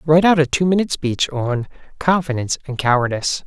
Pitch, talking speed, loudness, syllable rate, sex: 145 Hz, 175 wpm, -18 LUFS, 6.4 syllables/s, male